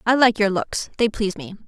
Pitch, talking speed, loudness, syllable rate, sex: 225 Hz, 250 wpm, -21 LUFS, 5.8 syllables/s, female